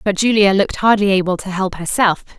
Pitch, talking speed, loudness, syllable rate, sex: 195 Hz, 200 wpm, -15 LUFS, 6.0 syllables/s, female